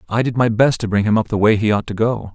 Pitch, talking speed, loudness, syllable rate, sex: 110 Hz, 360 wpm, -17 LUFS, 6.5 syllables/s, male